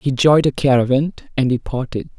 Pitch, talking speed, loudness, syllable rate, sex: 135 Hz, 165 wpm, -17 LUFS, 6.0 syllables/s, male